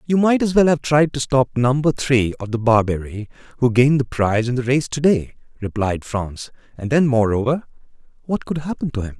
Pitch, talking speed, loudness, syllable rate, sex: 130 Hz, 210 wpm, -19 LUFS, 5.5 syllables/s, male